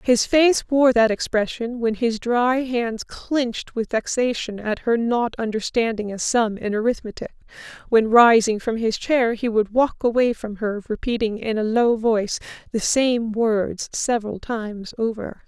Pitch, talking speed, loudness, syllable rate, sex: 230 Hz, 165 wpm, -21 LUFS, 4.4 syllables/s, female